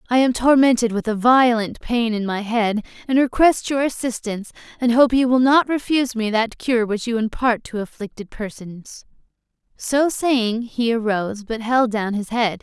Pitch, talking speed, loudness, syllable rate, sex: 235 Hz, 180 wpm, -19 LUFS, 4.8 syllables/s, female